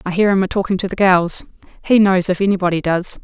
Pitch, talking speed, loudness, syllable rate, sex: 190 Hz, 240 wpm, -16 LUFS, 6.3 syllables/s, female